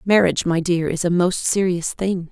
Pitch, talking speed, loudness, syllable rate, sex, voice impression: 180 Hz, 210 wpm, -19 LUFS, 5.0 syllables/s, female, feminine, very adult-like, sincere, slightly calm